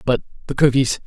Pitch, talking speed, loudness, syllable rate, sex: 130 Hz, 170 wpm, -18 LUFS, 6.3 syllables/s, male